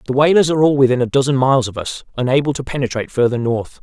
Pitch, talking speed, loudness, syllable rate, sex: 130 Hz, 235 wpm, -16 LUFS, 7.3 syllables/s, male